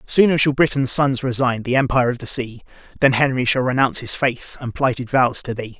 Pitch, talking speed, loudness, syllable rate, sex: 130 Hz, 215 wpm, -19 LUFS, 5.7 syllables/s, male